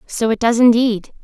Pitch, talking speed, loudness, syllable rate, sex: 230 Hz, 195 wpm, -15 LUFS, 4.8 syllables/s, female